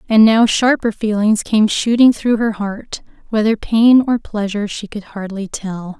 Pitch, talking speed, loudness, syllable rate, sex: 215 Hz, 170 wpm, -15 LUFS, 4.4 syllables/s, female